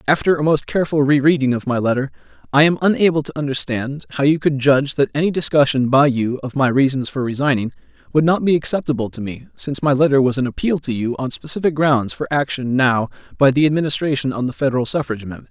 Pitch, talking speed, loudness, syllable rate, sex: 140 Hz, 215 wpm, -18 LUFS, 6.5 syllables/s, male